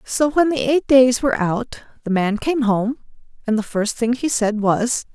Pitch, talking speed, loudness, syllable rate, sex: 240 Hz, 210 wpm, -19 LUFS, 4.5 syllables/s, female